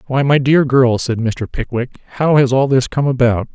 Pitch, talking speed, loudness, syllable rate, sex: 130 Hz, 220 wpm, -15 LUFS, 5.0 syllables/s, male